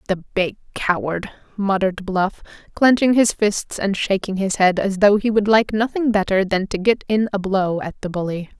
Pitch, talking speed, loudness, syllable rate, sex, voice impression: 200 Hz, 195 wpm, -19 LUFS, 4.9 syllables/s, female, feminine, slightly middle-aged, slightly powerful, slightly muffled, fluent, intellectual, calm, elegant, slightly strict, slightly sharp